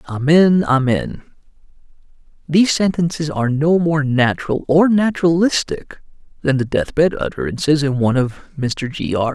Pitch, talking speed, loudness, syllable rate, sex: 150 Hz, 135 wpm, -17 LUFS, 5.0 syllables/s, male